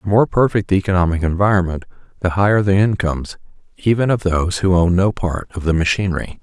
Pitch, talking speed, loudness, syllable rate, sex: 95 Hz, 185 wpm, -17 LUFS, 6.4 syllables/s, male